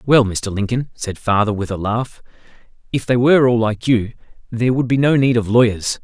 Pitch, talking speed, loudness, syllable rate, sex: 115 Hz, 210 wpm, -17 LUFS, 5.4 syllables/s, male